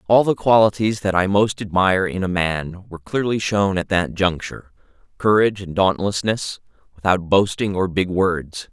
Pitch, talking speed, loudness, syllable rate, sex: 95 Hz, 165 wpm, -19 LUFS, 4.9 syllables/s, male